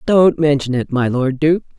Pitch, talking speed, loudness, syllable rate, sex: 145 Hz, 200 wpm, -16 LUFS, 4.5 syllables/s, female